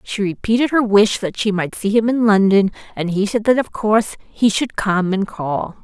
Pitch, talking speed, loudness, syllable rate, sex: 210 Hz, 225 wpm, -17 LUFS, 4.8 syllables/s, female